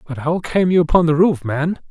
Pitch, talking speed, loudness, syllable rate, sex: 160 Hz, 250 wpm, -17 LUFS, 5.2 syllables/s, male